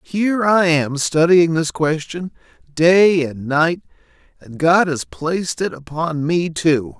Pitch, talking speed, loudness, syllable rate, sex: 165 Hz, 145 wpm, -17 LUFS, 3.7 syllables/s, male